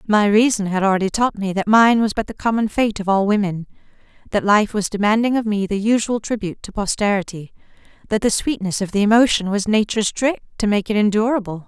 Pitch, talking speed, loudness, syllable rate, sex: 210 Hz, 205 wpm, -18 LUFS, 6.0 syllables/s, female